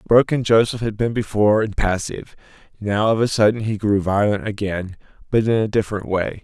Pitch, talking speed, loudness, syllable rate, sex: 105 Hz, 185 wpm, -19 LUFS, 5.6 syllables/s, male